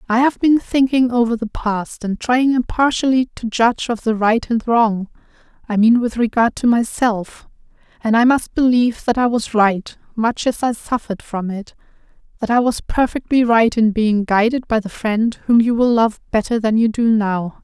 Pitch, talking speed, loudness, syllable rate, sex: 230 Hz, 195 wpm, -17 LUFS, 4.8 syllables/s, female